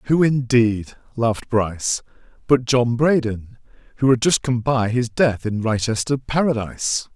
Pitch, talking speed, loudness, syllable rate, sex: 120 Hz, 140 wpm, -20 LUFS, 4.4 syllables/s, male